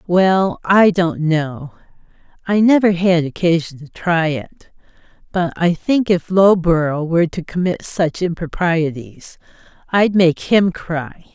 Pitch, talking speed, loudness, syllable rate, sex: 170 Hz, 130 wpm, -16 LUFS, 3.8 syllables/s, female